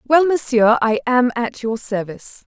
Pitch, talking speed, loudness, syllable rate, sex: 245 Hz, 165 wpm, -17 LUFS, 4.5 syllables/s, female